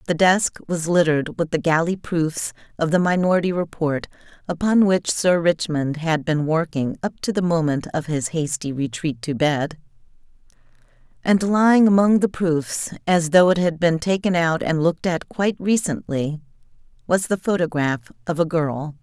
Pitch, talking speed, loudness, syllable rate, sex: 165 Hz, 165 wpm, -20 LUFS, 4.8 syllables/s, female